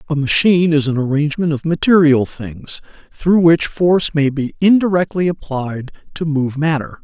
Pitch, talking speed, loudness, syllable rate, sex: 155 Hz, 155 wpm, -15 LUFS, 4.9 syllables/s, male